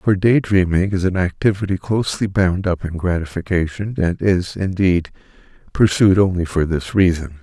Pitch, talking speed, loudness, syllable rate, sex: 90 Hz, 155 wpm, -18 LUFS, 4.9 syllables/s, male